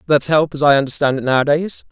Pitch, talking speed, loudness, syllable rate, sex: 140 Hz, 220 wpm, -16 LUFS, 6.5 syllables/s, male